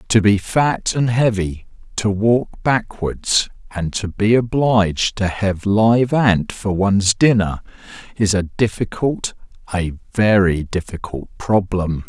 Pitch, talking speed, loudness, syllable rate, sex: 105 Hz, 130 wpm, -18 LUFS, 3.8 syllables/s, male